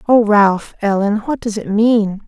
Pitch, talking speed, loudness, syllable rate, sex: 210 Hz, 130 wpm, -15 LUFS, 4.0 syllables/s, female